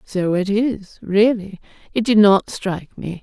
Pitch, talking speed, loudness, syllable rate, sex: 200 Hz, 165 wpm, -18 LUFS, 4.0 syllables/s, female